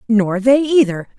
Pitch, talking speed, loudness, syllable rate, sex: 230 Hz, 150 wpm, -15 LUFS, 4.3 syllables/s, female